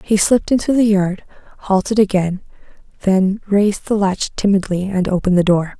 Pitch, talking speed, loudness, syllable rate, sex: 195 Hz, 165 wpm, -16 LUFS, 5.5 syllables/s, female